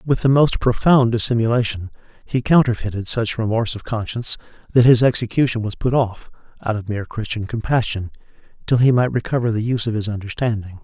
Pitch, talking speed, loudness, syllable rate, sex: 115 Hz, 170 wpm, -19 LUFS, 6.1 syllables/s, male